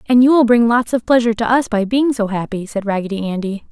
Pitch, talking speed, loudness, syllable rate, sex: 225 Hz, 260 wpm, -16 LUFS, 6.3 syllables/s, female